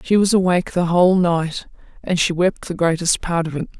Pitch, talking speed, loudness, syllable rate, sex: 175 Hz, 220 wpm, -18 LUFS, 5.5 syllables/s, female